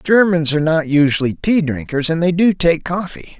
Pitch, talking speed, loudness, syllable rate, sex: 160 Hz, 195 wpm, -16 LUFS, 5.1 syllables/s, male